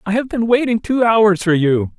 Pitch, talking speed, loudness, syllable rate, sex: 205 Hz, 240 wpm, -15 LUFS, 4.9 syllables/s, male